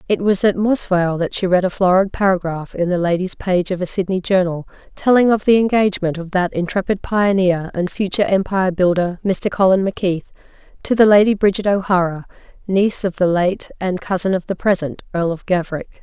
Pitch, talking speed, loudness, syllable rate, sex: 185 Hz, 185 wpm, -17 LUFS, 5.8 syllables/s, female